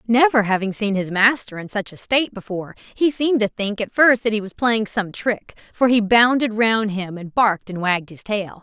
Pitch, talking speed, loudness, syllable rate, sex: 215 Hz, 230 wpm, -19 LUFS, 5.3 syllables/s, female